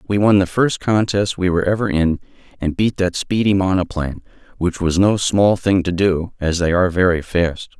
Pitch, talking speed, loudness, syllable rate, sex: 90 Hz, 200 wpm, -18 LUFS, 5.2 syllables/s, male